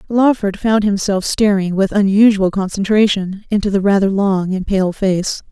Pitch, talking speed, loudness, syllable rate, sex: 200 Hz, 150 wpm, -15 LUFS, 4.6 syllables/s, female